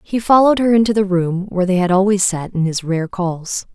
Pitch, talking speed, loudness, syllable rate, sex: 190 Hz, 240 wpm, -16 LUFS, 5.6 syllables/s, female